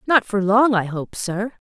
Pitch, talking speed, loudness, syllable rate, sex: 210 Hz, 215 wpm, -20 LUFS, 4.1 syllables/s, female